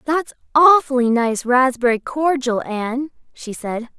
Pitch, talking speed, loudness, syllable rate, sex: 260 Hz, 120 wpm, -18 LUFS, 4.2 syllables/s, female